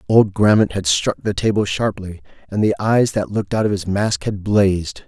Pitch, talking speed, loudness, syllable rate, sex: 100 Hz, 215 wpm, -18 LUFS, 5.0 syllables/s, male